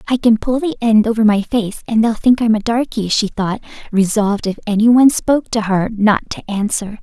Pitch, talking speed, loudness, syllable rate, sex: 220 Hz, 215 wpm, -15 LUFS, 5.3 syllables/s, female